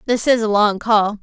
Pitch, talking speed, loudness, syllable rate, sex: 215 Hz, 245 wpm, -16 LUFS, 4.9 syllables/s, female